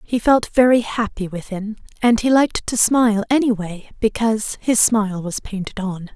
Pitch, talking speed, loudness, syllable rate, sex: 215 Hz, 165 wpm, -18 LUFS, 5.0 syllables/s, female